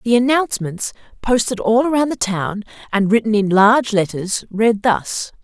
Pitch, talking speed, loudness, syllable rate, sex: 220 Hz, 155 wpm, -17 LUFS, 4.8 syllables/s, female